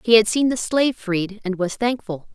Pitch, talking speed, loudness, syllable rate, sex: 215 Hz, 230 wpm, -21 LUFS, 5.1 syllables/s, female